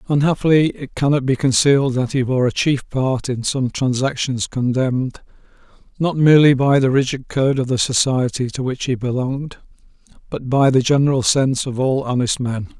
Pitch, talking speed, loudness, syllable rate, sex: 130 Hz, 175 wpm, -18 LUFS, 5.2 syllables/s, male